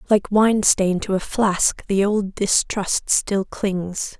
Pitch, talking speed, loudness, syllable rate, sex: 200 Hz, 155 wpm, -20 LUFS, 3.1 syllables/s, female